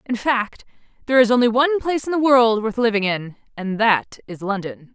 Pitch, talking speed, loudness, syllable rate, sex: 230 Hz, 205 wpm, -19 LUFS, 5.5 syllables/s, female